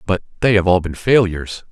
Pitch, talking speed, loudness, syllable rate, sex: 95 Hz, 210 wpm, -16 LUFS, 5.9 syllables/s, male